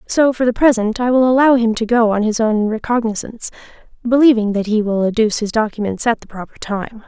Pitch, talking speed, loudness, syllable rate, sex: 225 Hz, 210 wpm, -16 LUFS, 6.0 syllables/s, female